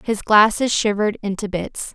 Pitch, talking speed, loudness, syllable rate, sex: 210 Hz, 155 wpm, -18 LUFS, 5.0 syllables/s, female